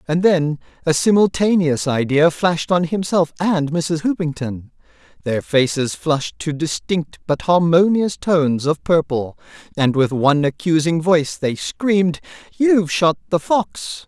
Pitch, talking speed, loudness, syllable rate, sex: 160 Hz, 135 wpm, -18 LUFS, 4.4 syllables/s, male